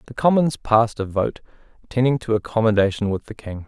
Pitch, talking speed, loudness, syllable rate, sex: 115 Hz, 180 wpm, -20 LUFS, 5.9 syllables/s, male